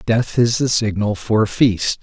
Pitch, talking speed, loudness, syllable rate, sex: 110 Hz, 210 wpm, -17 LUFS, 4.2 syllables/s, male